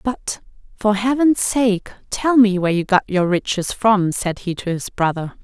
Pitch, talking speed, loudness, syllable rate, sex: 205 Hz, 190 wpm, -18 LUFS, 4.4 syllables/s, female